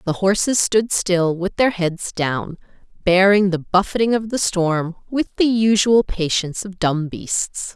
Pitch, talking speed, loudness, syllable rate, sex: 195 Hz, 160 wpm, -19 LUFS, 4.0 syllables/s, female